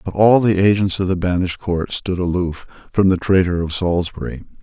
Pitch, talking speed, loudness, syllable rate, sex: 90 Hz, 195 wpm, -18 LUFS, 5.6 syllables/s, male